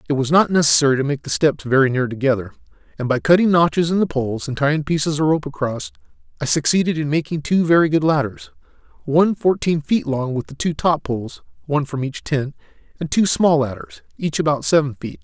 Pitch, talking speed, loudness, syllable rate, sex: 150 Hz, 205 wpm, -19 LUFS, 6.0 syllables/s, male